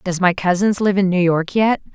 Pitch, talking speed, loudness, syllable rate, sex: 190 Hz, 245 wpm, -17 LUFS, 5.0 syllables/s, female